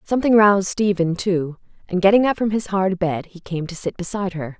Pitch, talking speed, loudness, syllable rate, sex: 190 Hz, 220 wpm, -20 LUFS, 5.7 syllables/s, female